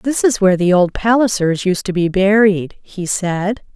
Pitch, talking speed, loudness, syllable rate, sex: 195 Hz, 190 wpm, -15 LUFS, 4.4 syllables/s, female